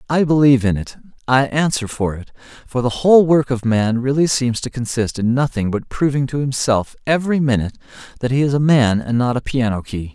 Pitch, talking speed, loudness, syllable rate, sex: 130 Hz, 215 wpm, -17 LUFS, 5.7 syllables/s, male